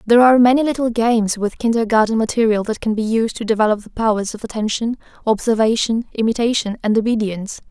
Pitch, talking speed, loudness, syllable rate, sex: 225 Hz, 170 wpm, -17 LUFS, 6.5 syllables/s, female